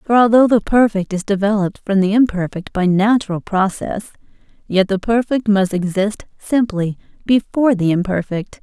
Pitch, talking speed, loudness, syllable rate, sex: 205 Hz, 145 wpm, -17 LUFS, 5.2 syllables/s, female